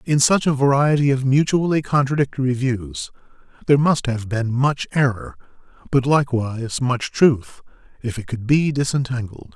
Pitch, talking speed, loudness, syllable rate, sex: 130 Hz, 145 wpm, -19 LUFS, 5.0 syllables/s, male